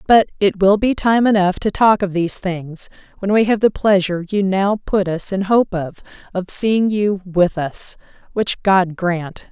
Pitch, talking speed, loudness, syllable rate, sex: 195 Hz, 195 wpm, -17 LUFS, 4.3 syllables/s, female